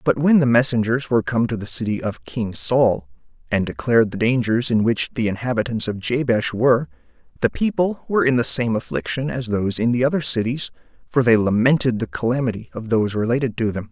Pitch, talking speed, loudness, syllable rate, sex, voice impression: 120 Hz, 200 wpm, -20 LUFS, 5.9 syllables/s, male, masculine, adult-like, slightly fluent, slightly intellectual, friendly, kind